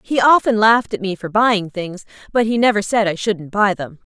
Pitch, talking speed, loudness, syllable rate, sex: 205 Hz, 235 wpm, -17 LUFS, 5.2 syllables/s, female